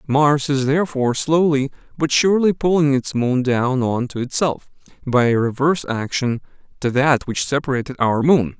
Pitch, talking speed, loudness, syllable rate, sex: 135 Hz, 160 wpm, -19 LUFS, 5.0 syllables/s, male